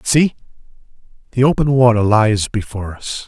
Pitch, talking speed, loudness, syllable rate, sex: 115 Hz, 130 wpm, -16 LUFS, 5.1 syllables/s, male